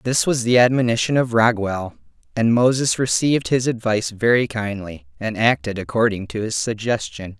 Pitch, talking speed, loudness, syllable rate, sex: 110 Hz, 155 wpm, -19 LUFS, 5.2 syllables/s, male